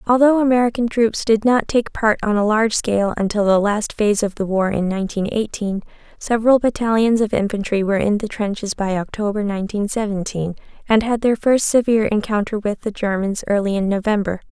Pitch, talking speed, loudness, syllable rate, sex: 210 Hz, 185 wpm, -19 LUFS, 5.8 syllables/s, female